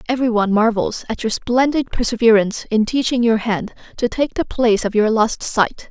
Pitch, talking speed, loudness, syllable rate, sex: 230 Hz, 195 wpm, -18 LUFS, 5.5 syllables/s, female